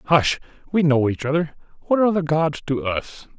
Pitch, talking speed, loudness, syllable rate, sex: 155 Hz, 175 wpm, -21 LUFS, 5.3 syllables/s, male